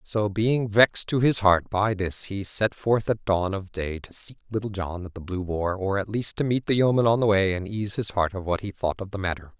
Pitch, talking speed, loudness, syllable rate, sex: 100 Hz, 275 wpm, -25 LUFS, 5.2 syllables/s, male